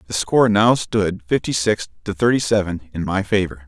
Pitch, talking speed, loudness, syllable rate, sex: 100 Hz, 195 wpm, -19 LUFS, 5.3 syllables/s, male